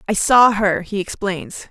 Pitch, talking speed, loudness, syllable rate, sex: 205 Hz, 175 wpm, -17 LUFS, 4.0 syllables/s, female